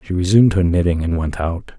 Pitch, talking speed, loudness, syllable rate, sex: 90 Hz, 235 wpm, -17 LUFS, 6.3 syllables/s, male